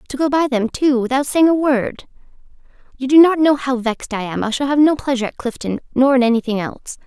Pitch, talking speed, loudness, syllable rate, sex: 260 Hz, 240 wpm, -17 LUFS, 6.2 syllables/s, female